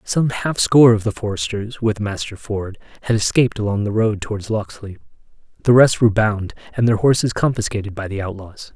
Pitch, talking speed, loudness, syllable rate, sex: 110 Hz, 185 wpm, -18 LUFS, 5.6 syllables/s, male